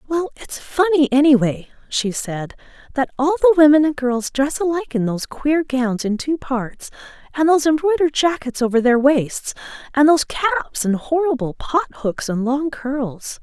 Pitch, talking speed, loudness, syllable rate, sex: 280 Hz, 170 wpm, -18 LUFS, 4.7 syllables/s, female